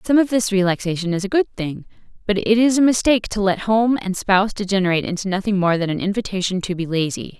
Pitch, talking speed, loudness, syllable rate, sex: 195 Hz, 225 wpm, -19 LUFS, 6.5 syllables/s, female